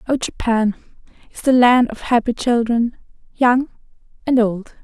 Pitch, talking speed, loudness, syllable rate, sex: 240 Hz, 135 wpm, -17 LUFS, 4.5 syllables/s, female